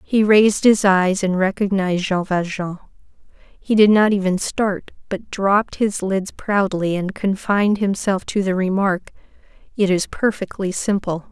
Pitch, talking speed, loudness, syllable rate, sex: 195 Hz, 150 wpm, -19 LUFS, 4.5 syllables/s, female